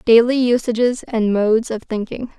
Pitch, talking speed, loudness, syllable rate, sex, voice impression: 230 Hz, 150 wpm, -18 LUFS, 4.9 syllables/s, female, very feminine, slightly young, very thin, relaxed, slightly weak, dark, very soft, slightly muffled, fluent, very cute, very intellectual, slightly refreshing, very sincere, very calm, very friendly, very reassuring, very unique, very elegant, very sweet, very kind, very modest